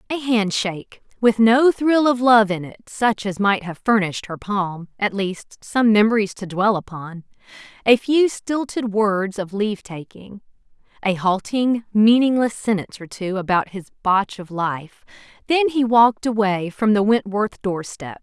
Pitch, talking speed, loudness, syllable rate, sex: 210 Hz, 160 wpm, -19 LUFS, 4.4 syllables/s, female